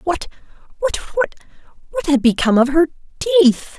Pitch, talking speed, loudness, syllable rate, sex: 255 Hz, 95 wpm, -17 LUFS, 5.5 syllables/s, female